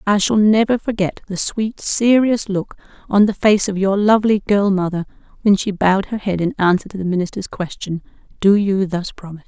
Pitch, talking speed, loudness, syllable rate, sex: 200 Hz, 195 wpm, -17 LUFS, 5.4 syllables/s, female